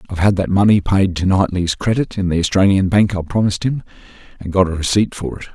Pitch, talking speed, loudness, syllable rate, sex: 95 Hz, 225 wpm, -16 LUFS, 6.3 syllables/s, male